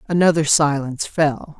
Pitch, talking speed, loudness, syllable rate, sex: 150 Hz, 115 wpm, -18 LUFS, 4.7 syllables/s, female